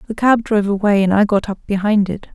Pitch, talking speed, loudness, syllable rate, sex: 205 Hz, 255 wpm, -16 LUFS, 6.4 syllables/s, female